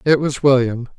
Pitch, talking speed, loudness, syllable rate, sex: 135 Hz, 185 wpm, -16 LUFS, 5.0 syllables/s, male